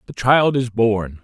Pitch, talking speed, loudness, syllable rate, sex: 115 Hz, 195 wpm, -17 LUFS, 3.8 syllables/s, male